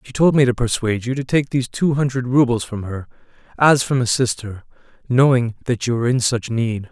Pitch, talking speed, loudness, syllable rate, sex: 120 Hz, 215 wpm, -18 LUFS, 5.7 syllables/s, male